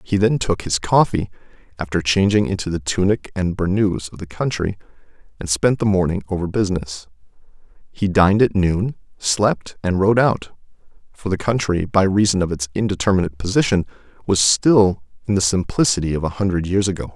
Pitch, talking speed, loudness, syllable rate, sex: 95 Hz, 170 wpm, -19 LUFS, 5.5 syllables/s, male